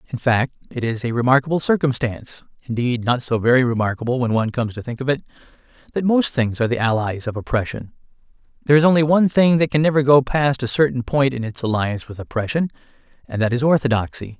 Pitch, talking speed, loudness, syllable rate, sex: 130 Hz, 200 wpm, -19 LUFS, 5.2 syllables/s, male